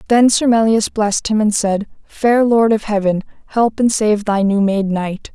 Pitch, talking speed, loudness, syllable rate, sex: 215 Hz, 200 wpm, -15 LUFS, 4.5 syllables/s, female